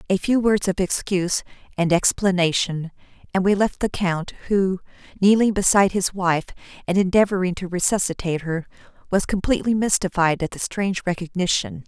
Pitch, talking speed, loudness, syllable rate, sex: 185 Hz, 145 wpm, -21 LUFS, 5.6 syllables/s, female